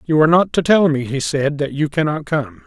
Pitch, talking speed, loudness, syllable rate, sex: 150 Hz, 270 wpm, -17 LUFS, 5.5 syllables/s, male